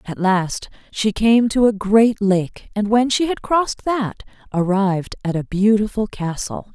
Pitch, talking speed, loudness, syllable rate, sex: 210 Hz, 170 wpm, -19 LUFS, 4.2 syllables/s, female